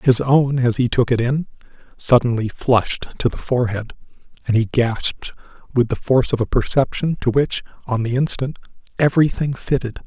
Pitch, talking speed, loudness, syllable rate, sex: 125 Hz, 165 wpm, -19 LUFS, 5.4 syllables/s, male